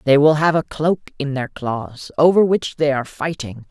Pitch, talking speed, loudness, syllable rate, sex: 145 Hz, 210 wpm, -18 LUFS, 4.8 syllables/s, male